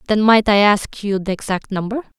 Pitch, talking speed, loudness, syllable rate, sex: 205 Hz, 220 wpm, -17 LUFS, 5.3 syllables/s, female